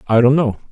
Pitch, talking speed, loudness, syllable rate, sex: 120 Hz, 250 wpm, -14 LUFS, 6.7 syllables/s, male